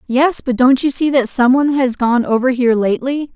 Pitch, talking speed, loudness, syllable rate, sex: 255 Hz, 235 wpm, -14 LUFS, 5.6 syllables/s, female